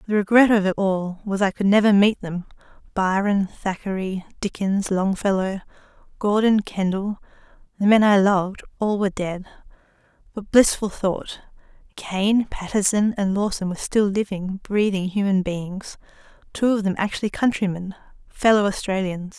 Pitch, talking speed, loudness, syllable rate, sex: 200 Hz, 130 wpm, -21 LUFS, 4.9 syllables/s, female